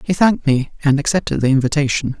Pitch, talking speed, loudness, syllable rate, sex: 145 Hz, 190 wpm, -17 LUFS, 6.6 syllables/s, male